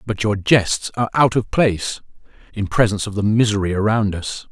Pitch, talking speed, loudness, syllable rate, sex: 105 Hz, 175 wpm, -18 LUFS, 5.5 syllables/s, male